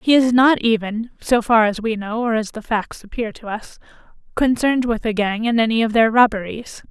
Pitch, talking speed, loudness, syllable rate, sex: 225 Hz, 215 wpm, -18 LUFS, 3.6 syllables/s, female